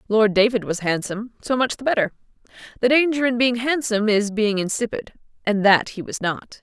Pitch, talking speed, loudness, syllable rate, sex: 220 Hz, 190 wpm, -20 LUFS, 5.6 syllables/s, female